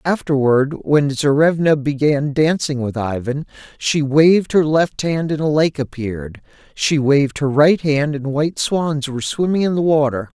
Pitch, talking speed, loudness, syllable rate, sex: 145 Hz, 170 wpm, -17 LUFS, 4.6 syllables/s, male